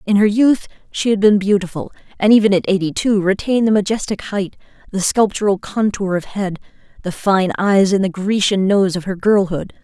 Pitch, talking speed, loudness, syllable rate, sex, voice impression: 200 Hz, 190 wpm, -16 LUFS, 5.3 syllables/s, female, feminine, adult-like, slightly powerful, intellectual, slightly elegant